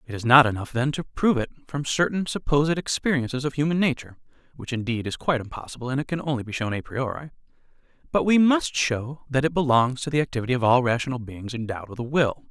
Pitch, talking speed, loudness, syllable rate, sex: 135 Hz, 220 wpm, -24 LUFS, 5.1 syllables/s, male